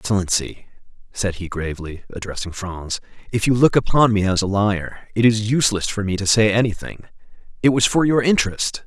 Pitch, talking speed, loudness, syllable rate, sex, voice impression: 105 Hz, 185 wpm, -19 LUFS, 5.5 syllables/s, male, very masculine, adult-like, slightly middle-aged, thick, tensed, slightly powerful, bright, slightly hard, clear, fluent, cool, intellectual, very refreshing, sincere, very calm, mature, friendly, reassuring, slightly elegant, sweet, lively, kind